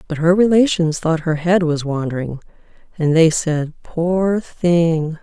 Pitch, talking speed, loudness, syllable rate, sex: 165 Hz, 150 wpm, -17 LUFS, 3.9 syllables/s, female